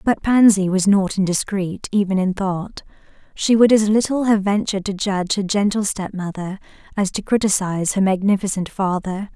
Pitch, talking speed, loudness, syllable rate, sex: 195 Hz, 160 wpm, -19 LUFS, 5.2 syllables/s, female